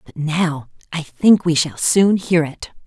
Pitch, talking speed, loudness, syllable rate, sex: 160 Hz, 190 wpm, -17 LUFS, 3.7 syllables/s, female